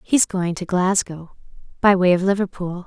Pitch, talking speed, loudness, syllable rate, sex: 185 Hz, 170 wpm, -19 LUFS, 4.7 syllables/s, female